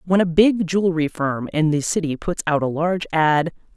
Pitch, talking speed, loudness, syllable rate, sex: 165 Hz, 205 wpm, -20 LUFS, 5.5 syllables/s, female